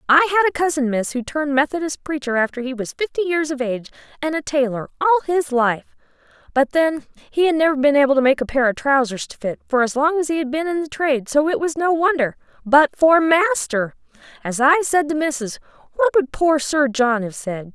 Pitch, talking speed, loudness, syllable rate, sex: 285 Hz, 225 wpm, -19 LUFS, 5.6 syllables/s, female